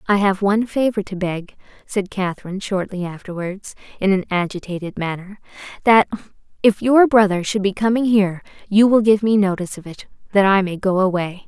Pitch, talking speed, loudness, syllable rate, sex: 195 Hz, 180 wpm, -18 LUFS, 5.6 syllables/s, female